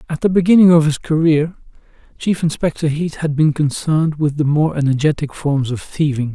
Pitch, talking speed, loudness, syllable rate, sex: 155 Hz, 180 wpm, -16 LUFS, 5.4 syllables/s, male